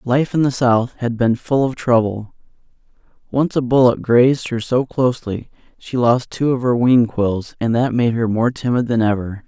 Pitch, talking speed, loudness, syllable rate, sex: 120 Hz, 195 wpm, -17 LUFS, 4.7 syllables/s, male